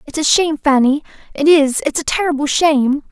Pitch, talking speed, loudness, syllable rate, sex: 295 Hz, 190 wpm, -15 LUFS, 5.9 syllables/s, female